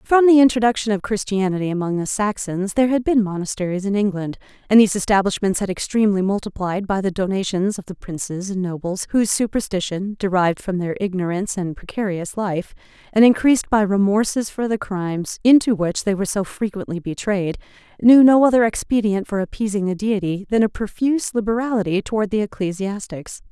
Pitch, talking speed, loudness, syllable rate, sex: 200 Hz, 170 wpm, -19 LUFS, 5.9 syllables/s, female